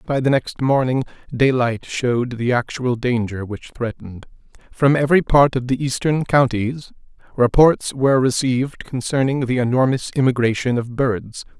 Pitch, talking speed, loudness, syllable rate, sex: 125 Hz, 140 wpm, -19 LUFS, 4.8 syllables/s, male